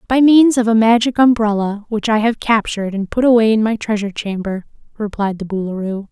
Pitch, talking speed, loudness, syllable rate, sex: 220 Hz, 195 wpm, -15 LUFS, 5.7 syllables/s, female